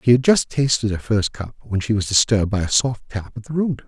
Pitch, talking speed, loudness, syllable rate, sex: 115 Hz, 295 wpm, -20 LUFS, 6.1 syllables/s, male